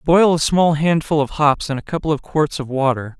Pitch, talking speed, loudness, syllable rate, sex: 150 Hz, 245 wpm, -18 LUFS, 5.2 syllables/s, male